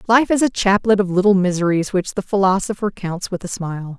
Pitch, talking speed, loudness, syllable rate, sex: 195 Hz, 210 wpm, -18 LUFS, 5.7 syllables/s, female